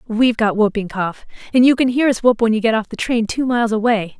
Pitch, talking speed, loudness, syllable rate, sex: 230 Hz, 270 wpm, -17 LUFS, 6.1 syllables/s, female